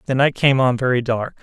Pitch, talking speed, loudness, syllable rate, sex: 130 Hz, 250 wpm, -18 LUFS, 5.6 syllables/s, male